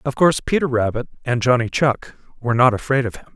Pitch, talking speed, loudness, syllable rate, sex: 125 Hz, 215 wpm, -19 LUFS, 6.3 syllables/s, male